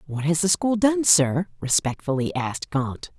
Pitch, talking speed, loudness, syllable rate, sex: 160 Hz, 170 wpm, -22 LUFS, 4.6 syllables/s, female